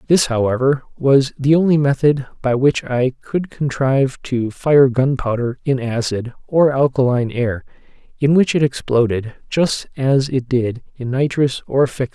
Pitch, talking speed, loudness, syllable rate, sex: 130 Hz, 160 wpm, -17 LUFS, 4.6 syllables/s, male